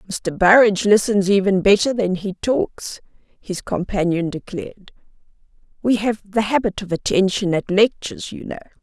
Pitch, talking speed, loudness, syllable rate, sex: 200 Hz, 145 wpm, -19 LUFS, 4.8 syllables/s, female